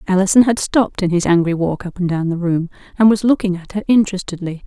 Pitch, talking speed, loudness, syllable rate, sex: 190 Hz, 230 wpm, -16 LUFS, 6.5 syllables/s, female